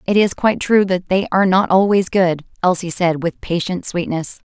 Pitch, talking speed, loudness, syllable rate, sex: 185 Hz, 200 wpm, -17 LUFS, 5.2 syllables/s, female